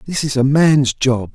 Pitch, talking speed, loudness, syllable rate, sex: 135 Hz, 225 wpm, -15 LUFS, 4.2 syllables/s, male